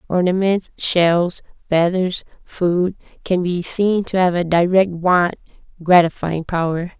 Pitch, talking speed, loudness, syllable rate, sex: 180 Hz, 120 wpm, -18 LUFS, 3.8 syllables/s, female